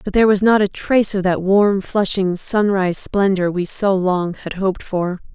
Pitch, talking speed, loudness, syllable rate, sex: 195 Hz, 200 wpm, -17 LUFS, 4.9 syllables/s, female